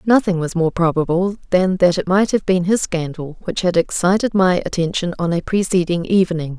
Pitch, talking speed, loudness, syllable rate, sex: 180 Hz, 190 wpm, -18 LUFS, 5.3 syllables/s, female